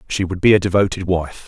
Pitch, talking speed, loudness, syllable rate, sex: 95 Hz, 245 wpm, -17 LUFS, 6.3 syllables/s, male